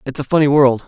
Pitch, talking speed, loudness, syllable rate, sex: 140 Hz, 275 wpm, -14 LUFS, 6.9 syllables/s, male